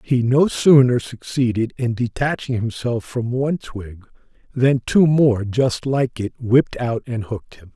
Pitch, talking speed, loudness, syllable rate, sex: 120 Hz, 165 wpm, -19 LUFS, 4.3 syllables/s, male